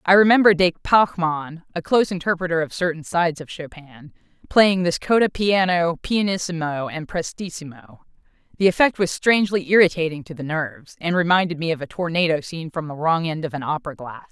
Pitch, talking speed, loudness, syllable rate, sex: 170 Hz, 170 wpm, -20 LUFS, 5.6 syllables/s, female